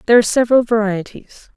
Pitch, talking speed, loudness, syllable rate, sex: 225 Hz, 155 wpm, -15 LUFS, 7.2 syllables/s, female